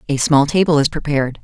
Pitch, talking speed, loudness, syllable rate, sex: 145 Hz, 210 wpm, -16 LUFS, 6.4 syllables/s, female